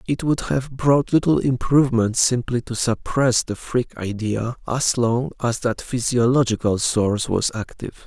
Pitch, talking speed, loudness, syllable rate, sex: 120 Hz, 150 wpm, -20 LUFS, 4.4 syllables/s, male